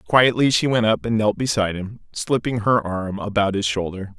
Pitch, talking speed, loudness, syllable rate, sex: 110 Hz, 200 wpm, -20 LUFS, 5.1 syllables/s, male